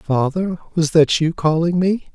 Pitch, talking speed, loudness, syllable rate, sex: 165 Hz, 170 wpm, -18 LUFS, 4.1 syllables/s, male